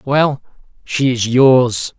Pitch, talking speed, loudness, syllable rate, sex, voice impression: 130 Hz, 120 wpm, -14 LUFS, 2.7 syllables/s, male, masculine, adult-like, refreshing, slightly sincere, slightly unique